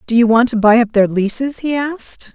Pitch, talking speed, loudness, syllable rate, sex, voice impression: 240 Hz, 255 wpm, -14 LUFS, 5.4 syllables/s, female, feminine, adult-like, slightly clear, slightly sincere, friendly, slightly elegant